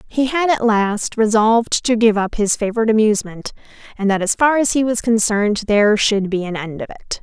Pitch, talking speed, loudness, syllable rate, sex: 220 Hz, 215 wpm, -17 LUFS, 5.7 syllables/s, female